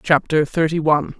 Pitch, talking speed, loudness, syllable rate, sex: 155 Hz, 150 wpm, -18 LUFS, 5.6 syllables/s, female